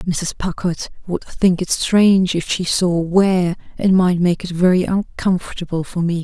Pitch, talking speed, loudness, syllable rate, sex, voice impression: 180 Hz, 175 wpm, -18 LUFS, 4.7 syllables/s, female, very feminine, very adult-like, thin, relaxed, weak, dark, very soft, muffled, fluent, slightly raspy, cute, very intellectual, slightly refreshing, very sincere, very calm, very friendly, very reassuring, unique, very elegant, sweet, very kind, very modest, light